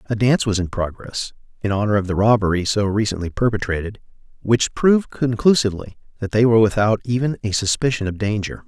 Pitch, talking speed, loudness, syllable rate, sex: 110 Hz, 175 wpm, -19 LUFS, 6.2 syllables/s, male